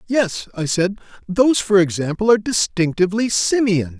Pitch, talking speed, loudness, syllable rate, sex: 195 Hz, 135 wpm, -18 LUFS, 5.2 syllables/s, male